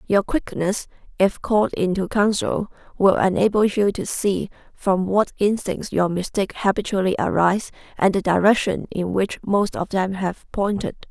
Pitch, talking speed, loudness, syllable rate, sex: 195 Hz, 150 wpm, -21 LUFS, 4.6 syllables/s, female